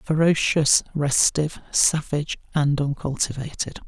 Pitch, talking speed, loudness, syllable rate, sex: 145 Hz, 75 wpm, -22 LUFS, 4.5 syllables/s, male